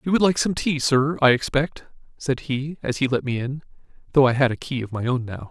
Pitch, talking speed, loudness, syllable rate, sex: 135 Hz, 260 wpm, -22 LUFS, 4.2 syllables/s, male